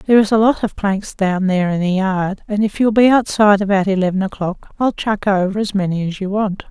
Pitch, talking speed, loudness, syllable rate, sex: 200 Hz, 240 wpm, -16 LUFS, 5.8 syllables/s, female